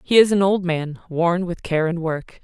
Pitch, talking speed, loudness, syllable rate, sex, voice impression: 175 Hz, 245 wpm, -20 LUFS, 4.5 syllables/s, female, feminine, gender-neutral, slightly young, slightly adult-like, slightly thin, slightly tensed, slightly weak, bright, hard, slightly clear, slightly fluent, slightly raspy, cool, very intellectual, refreshing, sincere, calm, friendly, reassuring, very unique, elegant, slightly wild, sweet, kind, slightly modest